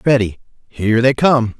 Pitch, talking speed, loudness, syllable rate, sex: 120 Hz, 150 wpm, -15 LUFS, 5.0 syllables/s, male